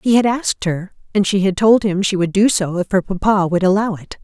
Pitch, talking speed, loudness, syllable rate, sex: 195 Hz, 270 wpm, -16 LUFS, 5.5 syllables/s, female